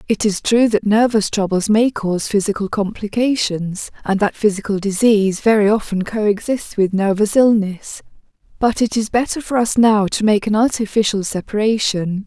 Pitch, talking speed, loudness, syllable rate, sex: 210 Hz, 155 wpm, -17 LUFS, 4.9 syllables/s, female